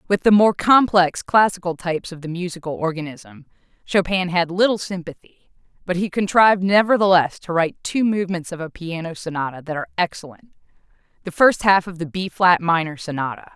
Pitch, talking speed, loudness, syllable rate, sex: 175 Hz, 165 wpm, -19 LUFS, 5.7 syllables/s, female